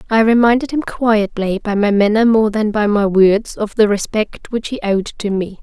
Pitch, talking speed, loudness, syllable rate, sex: 210 Hz, 215 wpm, -15 LUFS, 4.7 syllables/s, female